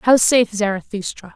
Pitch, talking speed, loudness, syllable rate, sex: 210 Hz, 135 wpm, -17 LUFS, 4.6 syllables/s, female